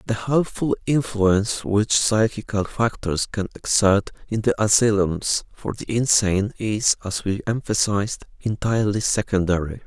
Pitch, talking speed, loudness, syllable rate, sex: 105 Hz, 120 wpm, -21 LUFS, 4.5 syllables/s, male